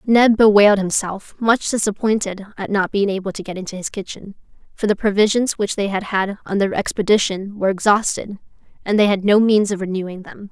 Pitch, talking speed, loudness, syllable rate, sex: 200 Hz, 195 wpm, -18 LUFS, 5.7 syllables/s, female